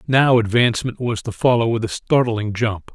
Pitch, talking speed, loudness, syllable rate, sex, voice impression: 115 Hz, 185 wpm, -19 LUFS, 5.0 syllables/s, male, very masculine, very adult-like, very middle-aged, very thick, tensed, very powerful, bright, slightly hard, clear, fluent, slightly raspy, very cool, intellectual, very sincere, very calm, very mature, friendly, very reassuring, unique, elegant, wild, sweet, slightly lively, kind